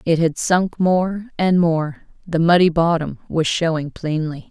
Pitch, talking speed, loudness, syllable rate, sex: 165 Hz, 145 wpm, -19 LUFS, 4.1 syllables/s, female